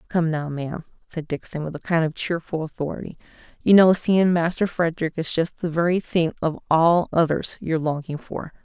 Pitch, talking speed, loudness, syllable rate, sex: 165 Hz, 190 wpm, -22 LUFS, 5.4 syllables/s, female